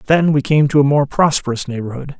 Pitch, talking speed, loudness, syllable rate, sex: 140 Hz, 220 wpm, -15 LUFS, 6.0 syllables/s, male